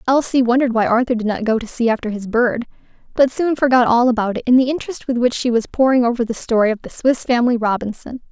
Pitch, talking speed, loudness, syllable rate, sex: 240 Hz, 245 wpm, -17 LUFS, 6.6 syllables/s, female